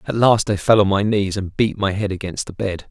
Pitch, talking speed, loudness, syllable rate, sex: 100 Hz, 290 wpm, -19 LUFS, 5.5 syllables/s, male